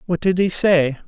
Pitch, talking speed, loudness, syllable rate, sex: 170 Hz, 225 wpm, -17 LUFS, 4.8 syllables/s, male